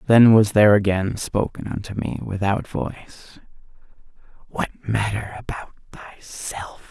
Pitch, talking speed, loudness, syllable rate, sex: 105 Hz, 115 wpm, -21 LUFS, 4.4 syllables/s, male